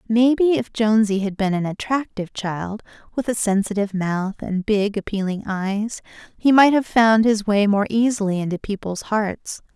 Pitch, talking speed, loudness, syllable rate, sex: 210 Hz, 165 wpm, -20 LUFS, 4.8 syllables/s, female